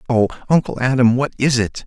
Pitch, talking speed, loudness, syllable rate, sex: 125 Hz, 195 wpm, -17 LUFS, 5.7 syllables/s, male